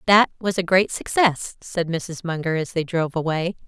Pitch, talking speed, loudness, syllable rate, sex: 175 Hz, 195 wpm, -22 LUFS, 4.9 syllables/s, female